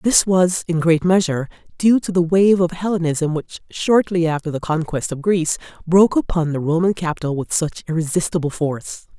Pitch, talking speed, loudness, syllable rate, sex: 170 Hz, 175 wpm, -18 LUFS, 5.4 syllables/s, female